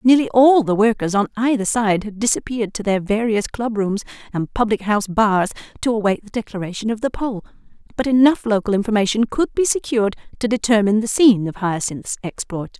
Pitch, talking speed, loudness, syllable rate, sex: 215 Hz, 185 wpm, -19 LUFS, 5.9 syllables/s, female